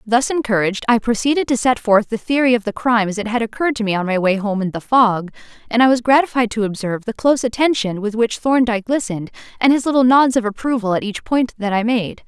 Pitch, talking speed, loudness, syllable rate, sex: 230 Hz, 245 wpm, -17 LUFS, 6.4 syllables/s, female